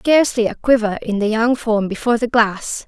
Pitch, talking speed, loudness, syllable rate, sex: 225 Hz, 210 wpm, -17 LUFS, 5.4 syllables/s, female